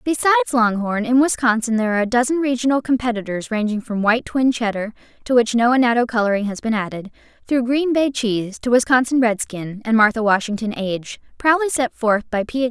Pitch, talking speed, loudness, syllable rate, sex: 235 Hz, 190 wpm, -19 LUFS, 5.9 syllables/s, female